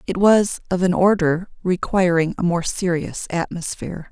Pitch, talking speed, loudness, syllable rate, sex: 180 Hz, 145 wpm, -20 LUFS, 4.7 syllables/s, female